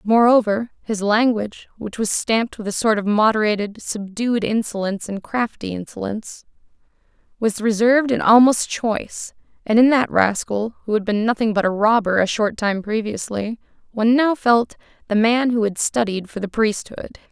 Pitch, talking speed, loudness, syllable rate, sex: 220 Hz, 165 wpm, -19 LUFS, 5.0 syllables/s, female